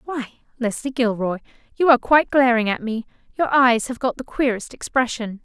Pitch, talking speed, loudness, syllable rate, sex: 245 Hz, 175 wpm, -20 LUFS, 5.4 syllables/s, female